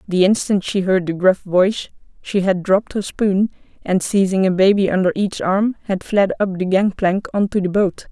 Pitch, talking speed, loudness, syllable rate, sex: 195 Hz, 205 wpm, -18 LUFS, 5.0 syllables/s, female